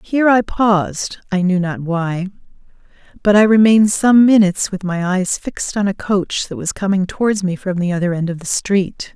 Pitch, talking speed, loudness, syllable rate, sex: 195 Hz, 205 wpm, -16 LUFS, 5.1 syllables/s, female